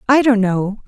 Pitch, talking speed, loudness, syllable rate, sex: 225 Hz, 205 wpm, -15 LUFS, 4.4 syllables/s, female